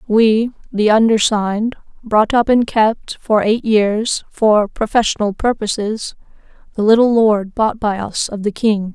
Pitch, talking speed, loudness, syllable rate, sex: 215 Hz, 150 wpm, -15 LUFS, 4.0 syllables/s, female